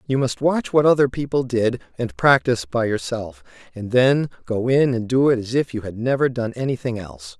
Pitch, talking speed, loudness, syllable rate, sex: 120 Hz, 210 wpm, -20 LUFS, 5.3 syllables/s, male